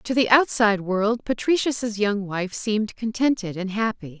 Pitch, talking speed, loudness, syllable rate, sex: 215 Hz, 155 wpm, -22 LUFS, 4.6 syllables/s, female